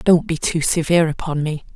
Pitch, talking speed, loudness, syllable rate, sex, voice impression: 160 Hz, 205 wpm, -19 LUFS, 5.7 syllables/s, female, feminine, adult-like, slightly clear, slightly sincere, calm, friendly